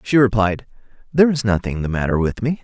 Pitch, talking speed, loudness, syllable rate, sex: 115 Hz, 205 wpm, -18 LUFS, 6.3 syllables/s, male